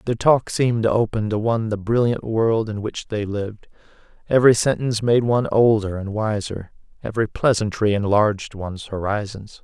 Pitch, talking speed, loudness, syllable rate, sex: 110 Hz, 160 wpm, -20 LUFS, 5.5 syllables/s, male